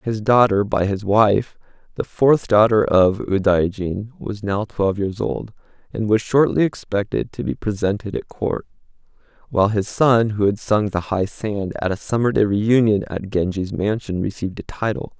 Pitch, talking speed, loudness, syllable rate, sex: 105 Hz, 175 wpm, -20 LUFS, 4.7 syllables/s, male